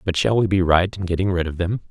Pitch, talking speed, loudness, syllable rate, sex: 90 Hz, 315 wpm, -20 LUFS, 6.4 syllables/s, male